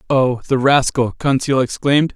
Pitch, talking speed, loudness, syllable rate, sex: 130 Hz, 140 wpm, -16 LUFS, 4.9 syllables/s, male